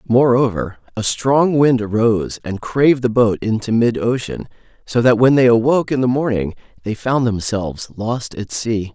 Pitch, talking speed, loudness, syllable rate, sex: 115 Hz, 175 wpm, -17 LUFS, 4.8 syllables/s, male